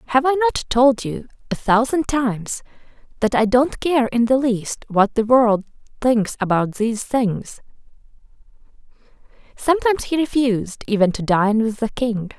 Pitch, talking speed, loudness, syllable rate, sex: 240 Hz, 150 wpm, -19 LUFS, 4.8 syllables/s, female